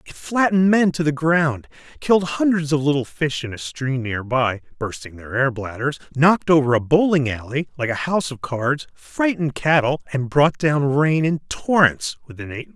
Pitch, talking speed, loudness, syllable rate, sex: 145 Hz, 195 wpm, -20 LUFS, 4.9 syllables/s, male